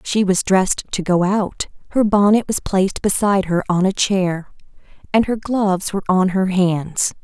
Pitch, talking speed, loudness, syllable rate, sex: 195 Hz, 185 wpm, -18 LUFS, 4.8 syllables/s, female